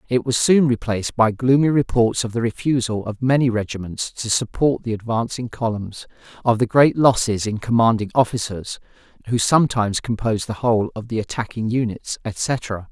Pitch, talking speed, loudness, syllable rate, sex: 115 Hz, 165 wpm, -20 LUFS, 5.3 syllables/s, male